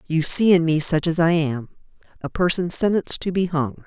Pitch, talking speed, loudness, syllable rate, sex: 165 Hz, 215 wpm, -19 LUFS, 5.2 syllables/s, female